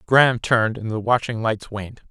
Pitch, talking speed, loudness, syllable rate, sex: 115 Hz, 200 wpm, -20 LUFS, 5.8 syllables/s, male